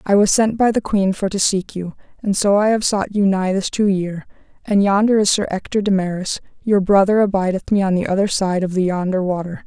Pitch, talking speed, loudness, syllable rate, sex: 195 Hz, 240 wpm, -18 LUFS, 5.5 syllables/s, female